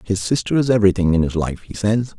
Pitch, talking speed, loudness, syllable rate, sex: 100 Hz, 245 wpm, -18 LUFS, 6.3 syllables/s, male